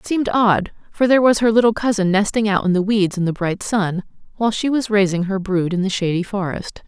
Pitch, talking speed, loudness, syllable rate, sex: 205 Hz, 245 wpm, -18 LUFS, 5.9 syllables/s, female